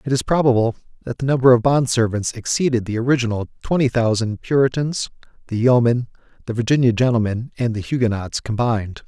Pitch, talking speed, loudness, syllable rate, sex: 120 Hz, 160 wpm, -19 LUFS, 6.0 syllables/s, male